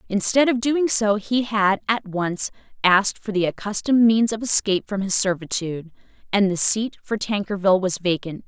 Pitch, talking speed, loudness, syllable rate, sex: 205 Hz, 175 wpm, -21 LUFS, 5.2 syllables/s, female